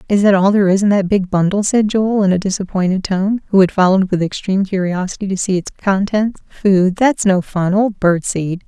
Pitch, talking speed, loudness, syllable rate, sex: 195 Hz, 210 wpm, -15 LUFS, 5.5 syllables/s, female